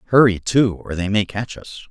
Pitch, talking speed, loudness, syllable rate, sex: 105 Hz, 220 wpm, -19 LUFS, 5.3 syllables/s, male